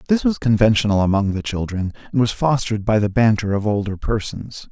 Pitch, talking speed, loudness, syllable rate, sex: 110 Hz, 190 wpm, -19 LUFS, 5.8 syllables/s, male